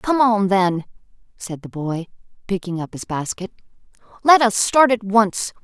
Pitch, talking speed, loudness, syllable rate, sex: 200 Hz, 160 wpm, -19 LUFS, 4.4 syllables/s, female